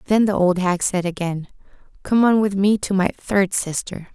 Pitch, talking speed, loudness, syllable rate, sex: 190 Hz, 205 wpm, -19 LUFS, 4.8 syllables/s, female